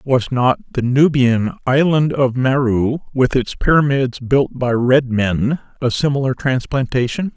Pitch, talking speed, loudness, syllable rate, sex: 130 Hz, 140 wpm, -17 LUFS, 4.1 syllables/s, male